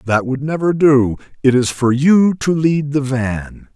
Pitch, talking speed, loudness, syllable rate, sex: 140 Hz, 190 wpm, -15 LUFS, 3.9 syllables/s, male